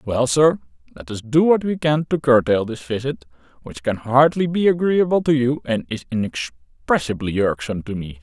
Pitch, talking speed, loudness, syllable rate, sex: 125 Hz, 180 wpm, -19 LUFS, 5.0 syllables/s, male